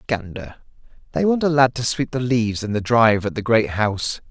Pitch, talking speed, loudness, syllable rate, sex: 120 Hz, 225 wpm, -19 LUFS, 5.6 syllables/s, male